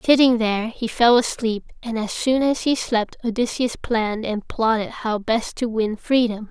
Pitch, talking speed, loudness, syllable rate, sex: 230 Hz, 185 wpm, -21 LUFS, 4.6 syllables/s, female